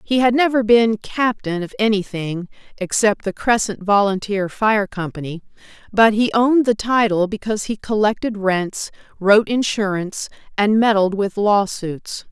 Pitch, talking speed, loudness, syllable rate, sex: 210 Hz, 135 wpm, -18 LUFS, 4.6 syllables/s, female